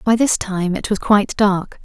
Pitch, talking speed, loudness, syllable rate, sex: 200 Hz, 230 wpm, -17 LUFS, 4.6 syllables/s, female